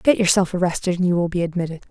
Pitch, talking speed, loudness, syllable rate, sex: 180 Hz, 250 wpm, -20 LUFS, 7.1 syllables/s, female